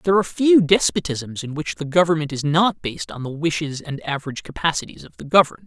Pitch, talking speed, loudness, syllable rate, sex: 155 Hz, 210 wpm, -20 LUFS, 6.4 syllables/s, male